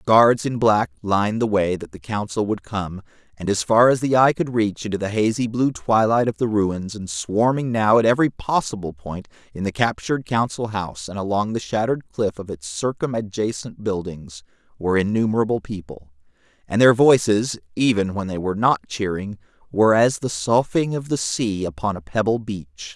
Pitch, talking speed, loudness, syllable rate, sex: 105 Hz, 185 wpm, -21 LUFS, 5.2 syllables/s, male